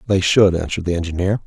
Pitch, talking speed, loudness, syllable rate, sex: 90 Hz, 205 wpm, -18 LUFS, 7.1 syllables/s, male